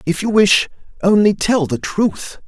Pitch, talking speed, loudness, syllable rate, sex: 190 Hz, 145 wpm, -15 LUFS, 4.0 syllables/s, male